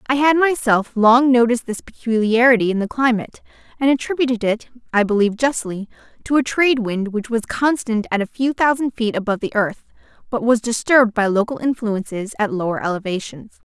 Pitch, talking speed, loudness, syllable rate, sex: 230 Hz, 175 wpm, -18 LUFS, 5.8 syllables/s, female